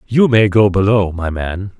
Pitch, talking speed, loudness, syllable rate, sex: 100 Hz, 200 wpm, -14 LUFS, 4.3 syllables/s, male